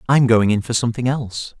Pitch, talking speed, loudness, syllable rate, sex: 115 Hz, 225 wpm, -18 LUFS, 6.3 syllables/s, male